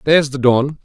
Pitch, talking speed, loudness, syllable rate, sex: 140 Hz, 215 wpm, -15 LUFS, 5.7 syllables/s, male